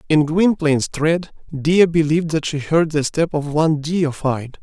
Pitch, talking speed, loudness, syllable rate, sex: 155 Hz, 170 wpm, -18 LUFS, 4.5 syllables/s, male